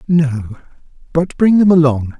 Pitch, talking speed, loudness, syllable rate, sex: 150 Hz, 135 wpm, -13 LUFS, 4.0 syllables/s, male